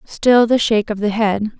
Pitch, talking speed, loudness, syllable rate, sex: 215 Hz, 225 wpm, -16 LUFS, 4.9 syllables/s, female